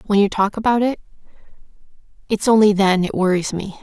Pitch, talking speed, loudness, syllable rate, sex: 205 Hz, 155 wpm, -17 LUFS, 6.0 syllables/s, female